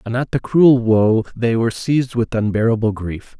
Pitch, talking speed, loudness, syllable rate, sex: 115 Hz, 195 wpm, -17 LUFS, 5.1 syllables/s, male